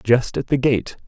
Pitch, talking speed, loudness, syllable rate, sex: 125 Hz, 225 wpm, -20 LUFS, 4.2 syllables/s, male